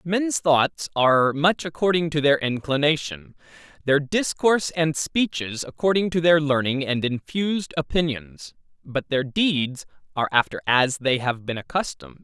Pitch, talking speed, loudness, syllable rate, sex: 145 Hz, 140 wpm, -22 LUFS, 4.6 syllables/s, male